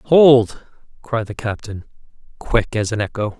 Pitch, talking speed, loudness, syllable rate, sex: 115 Hz, 140 wpm, -18 LUFS, 4.0 syllables/s, male